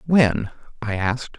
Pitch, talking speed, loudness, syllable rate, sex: 120 Hz, 130 wpm, -22 LUFS, 4.1 syllables/s, male